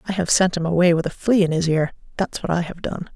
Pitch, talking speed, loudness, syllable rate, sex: 175 Hz, 305 wpm, -20 LUFS, 6.2 syllables/s, female